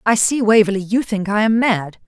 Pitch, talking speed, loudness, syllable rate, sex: 210 Hz, 230 wpm, -16 LUFS, 5.2 syllables/s, female